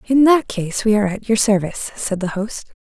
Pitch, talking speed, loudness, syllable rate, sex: 215 Hz, 235 wpm, -18 LUFS, 5.5 syllables/s, female